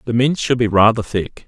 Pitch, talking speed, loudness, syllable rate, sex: 115 Hz, 245 wpm, -16 LUFS, 6.0 syllables/s, male